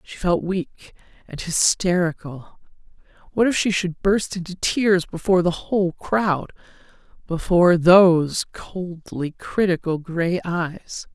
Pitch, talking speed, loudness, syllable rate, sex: 175 Hz, 115 wpm, -20 LUFS, 3.9 syllables/s, female